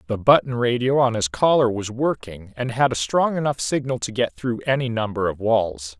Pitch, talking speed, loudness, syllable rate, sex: 115 Hz, 210 wpm, -21 LUFS, 5.0 syllables/s, male